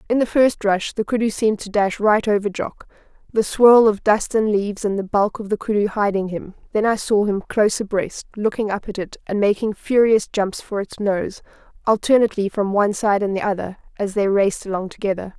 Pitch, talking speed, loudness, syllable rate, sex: 205 Hz, 210 wpm, -20 LUFS, 5.5 syllables/s, female